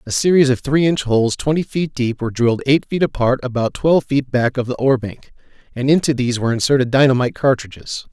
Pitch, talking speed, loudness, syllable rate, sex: 130 Hz, 215 wpm, -17 LUFS, 6.4 syllables/s, male